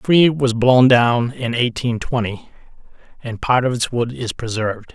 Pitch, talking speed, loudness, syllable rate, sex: 120 Hz, 180 wpm, -17 LUFS, 4.5 syllables/s, male